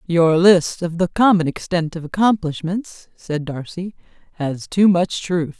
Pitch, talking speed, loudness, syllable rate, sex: 175 Hz, 150 wpm, -18 LUFS, 4.0 syllables/s, female